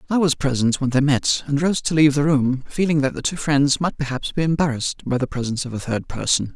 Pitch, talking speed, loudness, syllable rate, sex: 140 Hz, 255 wpm, -20 LUFS, 6.1 syllables/s, male